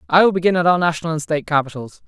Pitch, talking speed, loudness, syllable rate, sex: 165 Hz, 260 wpm, -17 LUFS, 8.0 syllables/s, male